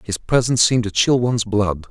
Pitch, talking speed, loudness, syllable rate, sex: 110 Hz, 220 wpm, -17 LUFS, 6.2 syllables/s, male